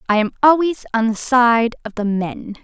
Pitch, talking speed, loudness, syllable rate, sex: 235 Hz, 205 wpm, -17 LUFS, 4.7 syllables/s, female